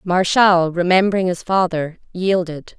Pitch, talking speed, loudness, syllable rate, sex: 180 Hz, 110 wpm, -17 LUFS, 4.3 syllables/s, female